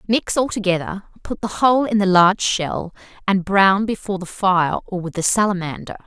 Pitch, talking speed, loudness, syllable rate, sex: 195 Hz, 180 wpm, -19 LUFS, 5.2 syllables/s, female